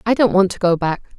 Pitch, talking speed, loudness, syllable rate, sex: 195 Hz, 305 wpm, -17 LUFS, 6.5 syllables/s, female